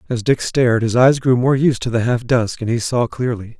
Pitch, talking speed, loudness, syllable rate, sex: 120 Hz, 265 wpm, -17 LUFS, 5.3 syllables/s, male